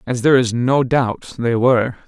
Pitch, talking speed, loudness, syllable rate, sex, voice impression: 125 Hz, 205 wpm, -17 LUFS, 5.0 syllables/s, male, very masculine, middle-aged, thick, tensed, slightly weak, bright, soft, clear, fluent, cool, intellectual, refreshing, sincere, very calm, friendly, very reassuring, unique, slightly elegant, wild, sweet, lively, kind, slightly intense